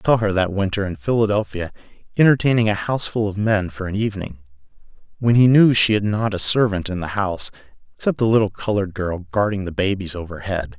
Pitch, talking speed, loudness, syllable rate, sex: 100 Hz, 195 wpm, -19 LUFS, 6.3 syllables/s, male